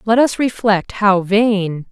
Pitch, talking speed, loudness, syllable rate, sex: 205 Hz, 155 wpm, -15 LUFS, 3.4 syllables/s, female